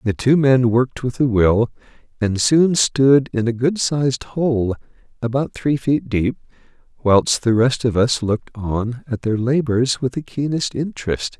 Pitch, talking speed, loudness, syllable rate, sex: 125 Hz, 175 wpm, -18 LUFS, 4.3 syllables/s, male